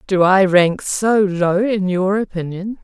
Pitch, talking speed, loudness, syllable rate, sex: 190 Hz, 170 wpm, -16 LUFS, 3.7 syllables/s, female